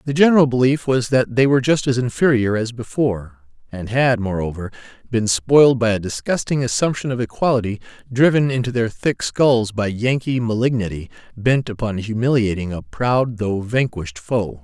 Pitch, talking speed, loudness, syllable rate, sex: 120 Hz, 160 wpm, -19 LUFS, 5.2 syllables/s, male